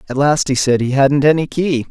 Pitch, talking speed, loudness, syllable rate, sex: 140 Hz, 250 wpm, -15 LUFS, 5.3 syllables/s, male